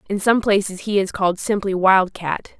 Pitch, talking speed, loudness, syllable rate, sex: 195 Hz, 210 wpm, -19 LUFS, 5.0 syllables/s, female